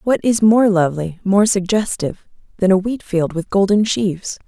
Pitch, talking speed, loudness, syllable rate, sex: 195 Hz, 175 wpm, -17 LUFS, 5.1 syllables/s, female